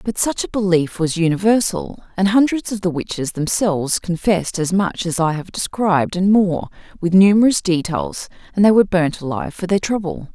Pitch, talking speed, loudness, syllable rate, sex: 185 Hz, 185 wpm, -18 LUFS, 5.4 syllables/s, female